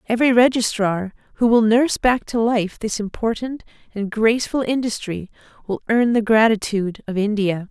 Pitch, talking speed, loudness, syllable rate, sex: 220 Hz, 150 wpm, -19 LUFS, 5.2 syllables/s, female